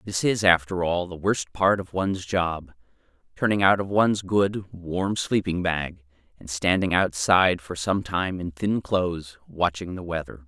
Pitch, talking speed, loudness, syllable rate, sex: 90 Hz, 170 wpm, -24 LUFS, 4.4 syllables/s, male